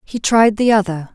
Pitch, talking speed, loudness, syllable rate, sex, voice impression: 210 Hz, 210 wpm, -14 LUFS, 4.8 syllables/s, female, very feminine, slightly young, very thin, very tensed, slightly powerful, bright, slightly soft, clear, very fluent, slightly raspy, slightly cute, cool, intellectual, very refreshing, sincere, calm, friendly, very reassuring, unique, elegant, slightly wild, slightly sweet, lively, strict, slightly intense, slightly sharp, light